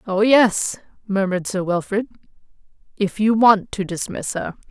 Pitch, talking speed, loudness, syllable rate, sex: 200 Hz, 140 wpm, -19 LUFS, 4.5 syllables/s, female